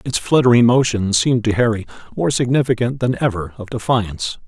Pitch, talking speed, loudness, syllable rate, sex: 120 Hz, 160 wpm, -17 LUFS, 5.8 syllables/s, male